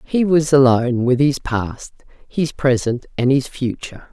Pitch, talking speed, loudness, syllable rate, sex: 135 Hz, 160 wpm, -17 LUFS, 4.4 syllables/s, female